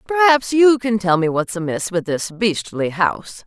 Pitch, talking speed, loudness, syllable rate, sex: 205 Hz, 190 wpm, -18 LUFS, 4.5 syllables/s, female